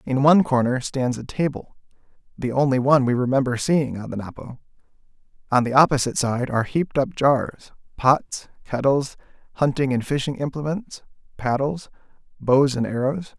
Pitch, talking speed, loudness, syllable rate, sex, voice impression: 135 Hz, 150 wpm, -21 LUFS, 4.2 syllables/s, male, very masculine, very adult-like, middle-aged, very thick, tensed, powerful, slightly bright, slightly hard, clear, fluent, slightly cool, intellectual, slightly refreshing, sincere, slightly calm, mature, slightly friendly, slightly reassuring, unique, slightly elegant, wild, lively, slightly strict, slightly intense, slightly modest